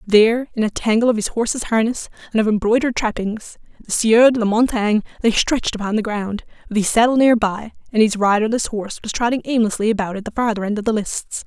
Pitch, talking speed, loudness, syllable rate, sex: 220 Hz, 220 wpm, -18 LUFS, 6.2 syllables/s, female